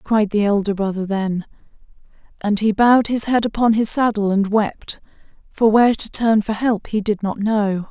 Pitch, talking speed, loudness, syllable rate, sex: 210 Hz, 190 wpm, -18 LUFS, 4.9 syllables/s, female